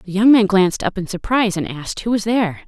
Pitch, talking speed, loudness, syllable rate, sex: 200 Hz, 270 wpm, -17 LUFS, 6.6 syllables/s, female